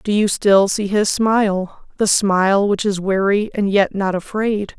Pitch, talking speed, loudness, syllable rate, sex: 200 Hz, 190 wpm, -17 LUFS, 4.2 syllables/s, female